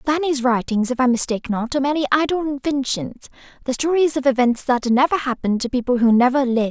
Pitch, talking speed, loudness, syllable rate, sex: 260 Hz, 195 wpm, -19 LUFS, 6.5 syllables/s, female